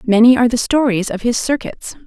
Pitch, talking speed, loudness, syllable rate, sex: 240 Hz, 205 wpm, -15 LUFS, 6.0 syllables/s, female